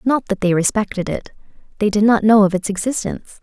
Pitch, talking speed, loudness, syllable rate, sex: 210 Hz, 210 wpm, -17 LUFS, 6.2 syllables/s, female